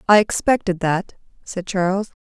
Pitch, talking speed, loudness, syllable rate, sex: 190 Hz, 135 wpm, -20 LUFS, 4.7 syllables/s, female